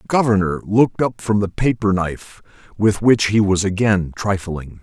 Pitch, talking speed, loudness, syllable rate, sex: 100 Hz, 175 wpm, -18 LUFS, 5.0 syllables/s, male